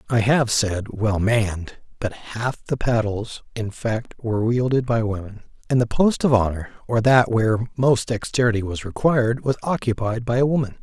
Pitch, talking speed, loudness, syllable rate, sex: 115 Hz, 175 wpm, -21 LUFS, 4.9 syllables/s, male